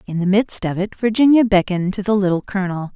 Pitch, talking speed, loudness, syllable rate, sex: 195 Hz, 225 wpm, -17 LUFS, 6.5 syllables/s, female